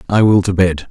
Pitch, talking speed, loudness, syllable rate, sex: 95 Hz, 265 wpm, -13 LUFS, 5.6 syllables/s, male